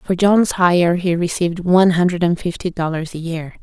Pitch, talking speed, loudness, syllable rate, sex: 175 Hz, 200 wpm, -17 LUFS, 5.2 syllables/s, female